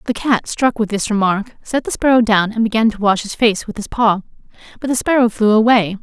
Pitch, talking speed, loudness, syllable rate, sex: 220 Hz, 240 wpm, -16 LUFS, 5.6 syllables/s, female